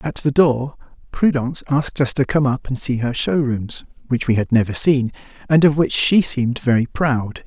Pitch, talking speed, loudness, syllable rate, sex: 135 Hz, 200 wpm, -18 LUFS, 5.1 syllables/s, male